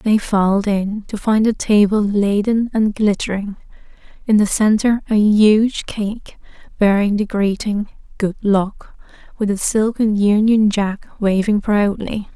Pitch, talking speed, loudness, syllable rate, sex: 210 Hz, 135 wpm, -17 LUFS, 3.9 syllables/s, female